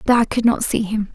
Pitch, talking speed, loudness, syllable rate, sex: 225 Hz, 315 wpm, -18 LUFS, 5.8 syllables/s, female